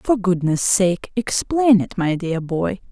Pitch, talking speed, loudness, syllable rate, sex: 195 Hz, 165 wpm, -19 LUFS, 3.6 syllables/s, female